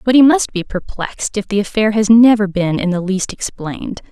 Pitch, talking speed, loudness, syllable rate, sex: 205 Hz, 220 wpm, -15 LUFS, 5.3 syllables/s, female